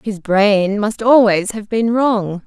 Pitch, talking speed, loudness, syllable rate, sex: 210 Hz, 170 wpm, -15 LUFS, 3.4 syllables/s, female